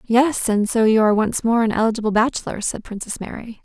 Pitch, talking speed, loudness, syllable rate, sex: 220 Hz, 215 wpm, -19 LUFS, 6.0 syllables/s, female